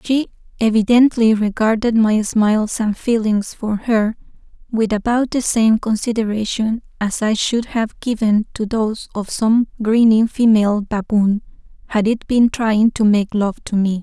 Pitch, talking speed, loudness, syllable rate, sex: 220 Hz, 150 wpm, -17 LUFS, 4.4 syllables/s, female